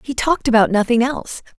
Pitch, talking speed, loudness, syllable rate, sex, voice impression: 245 Hz, 190 wpm, -17 LUFS, 6.7 syllables/s, female, feminine, slightly gender-neutral, adult-like, slightly middle-aged, thin, slightly tensed, slightly weak, slightly bright, slightly hard, slightly muffled, fluent, slightly cute, slightly intellectual, slightly refreshing, sincere, slightly calm, reassuring, elegant, strict, sharp, slightly modest